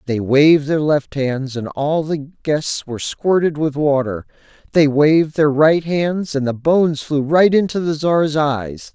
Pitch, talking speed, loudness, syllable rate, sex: 150 Hz, 180 wpm, -17 LUFS, 4.1 syllables/s, male